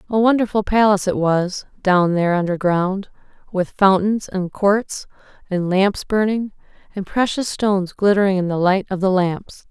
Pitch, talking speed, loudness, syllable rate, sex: 195 Hz, 155 wpm, -18 LUFS, 4.7 syllables/s, female